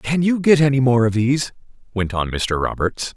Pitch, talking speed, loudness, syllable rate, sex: 125 Hz, 210 wpm, -18 LUFS, 5.2 syllables/s, male